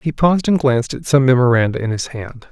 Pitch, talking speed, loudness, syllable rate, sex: 135 Hz, 240 wpm, -16 LUFS, 6.1 syllables/s, male